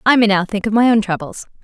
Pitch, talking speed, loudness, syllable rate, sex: 210 Hz, 295 wpm, -15 LUFS, 6.5 syllables/s, female